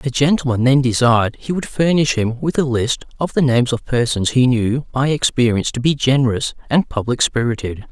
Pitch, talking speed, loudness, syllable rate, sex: 130 Hz, 195 wpm, -17 LUFS, 5.5 syllables/s, male